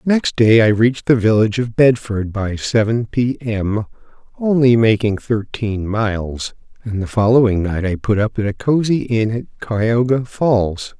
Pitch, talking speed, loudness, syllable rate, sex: 115 Hz, 165 wpm, -17 LUFS, 4.4 syllables/s, male